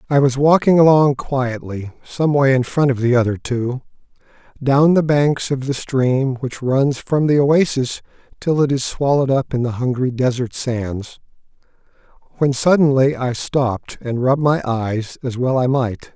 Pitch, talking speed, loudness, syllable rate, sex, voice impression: 130 Hz, 170 wpm, -17 LUFS, 4.4 syllables/s, male, masculine, middle-aged, relaxed, slightly powerful, soft, raspy, cool, calm, mature, reassuring, wild, lively, kind, modest